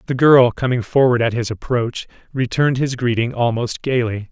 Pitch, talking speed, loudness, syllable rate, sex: 120 Hz, 165 wpm, -17 LUFS, 5.2 syllables/s, male